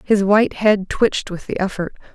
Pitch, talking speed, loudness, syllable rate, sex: 200 Hz, 195 wpm, -18 LUFS, 5.3 syllables/s, female